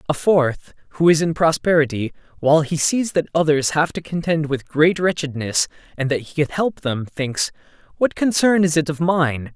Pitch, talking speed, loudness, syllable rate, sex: 155 Hz, 190 wpm, -19 LUFS, 4.9 syllables/s, male